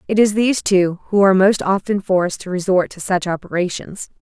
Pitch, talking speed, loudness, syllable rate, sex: 190 Hz, 200 wpm, -17 LUFS, 5.7 syllables/s, female